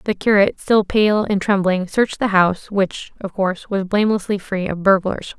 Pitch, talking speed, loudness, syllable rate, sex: 200 Hz, 190 wpm, -18 LUFS, 5.2 syllables/s, female